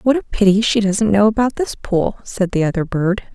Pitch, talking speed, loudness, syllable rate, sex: 205 Hz, 235 wpm, -17 LUFS, 5.2 syllables/s, female